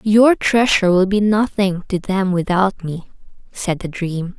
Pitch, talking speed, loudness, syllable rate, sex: 190 Hz, 165 wpm, -17 LUFS, 4.2 syllables/s, female